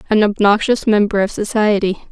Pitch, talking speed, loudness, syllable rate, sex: 210 Hz, 140 wpm, -15 LUFS, 5.3 syllables/s, female